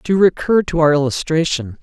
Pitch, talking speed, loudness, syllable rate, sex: 160 Hz, 165 wpm, -16 LUFS, 5.1 syllables/s, male